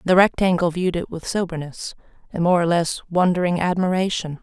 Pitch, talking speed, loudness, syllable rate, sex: 175 Hz, 165 wpm, -21 LUFS, 5.7 syllables/s, female